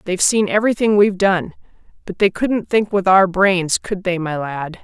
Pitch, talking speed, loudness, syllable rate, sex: 190 Hz, 200 wpm, -17 LUFS, 5.0 syllables/s, female